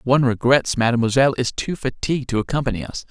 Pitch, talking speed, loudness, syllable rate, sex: 125 Hz, 175 wpm, -20 LUFS, 6.7 syllables/s, male